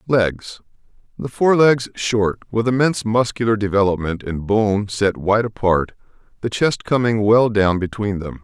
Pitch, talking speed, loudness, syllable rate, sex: 110 Hz, 140 wpm, -18 LUFS, 4.4 syllables/s, male